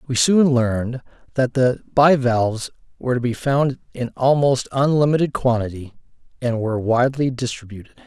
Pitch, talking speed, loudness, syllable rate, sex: 125 Hz, 135 wpm, -19 LUFS, 5.4 syllables/s, male